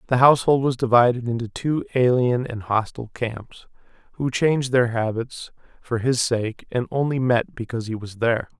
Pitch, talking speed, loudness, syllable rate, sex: 120 Hz, 170 wpm, -22 LUFS, 5.4 syllables/s, male